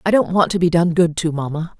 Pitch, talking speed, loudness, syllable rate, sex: 170 Hz, 300 wpm, -17 LUFS, 5.9 syllables/s, female